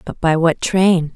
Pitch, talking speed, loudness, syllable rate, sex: 170 Hz, 210 wpm, -16 LUFS, 3.9 syllables/s, female